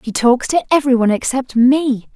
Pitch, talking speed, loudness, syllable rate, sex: 255 Hz, 165 wpm, -15 LUFS, 5.2 syllables/s, female